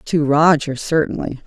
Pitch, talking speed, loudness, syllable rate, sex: 150 Hz, 125 wpm, -17 LUFS, 2.1 syllables/s, female